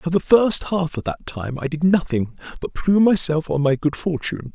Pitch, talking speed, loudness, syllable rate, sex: 160 Hz, 225 wpm, -20 LUFS, 5.2 syllables/s, male